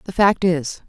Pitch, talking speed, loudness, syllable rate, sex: 175 Hz, 205 wpm, -18 LUFS, 4.2 syllables/s, female